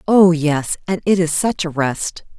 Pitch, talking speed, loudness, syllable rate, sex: 170 Hz, 200 wpm, -17 LUFS, 4.0 syllables/s, female